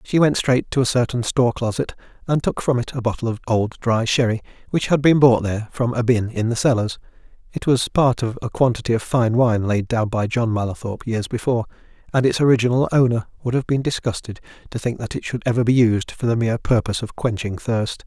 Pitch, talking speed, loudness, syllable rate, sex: 120 Hz, 220 wpm, -20 LUFS, 6.0 syllables/s, male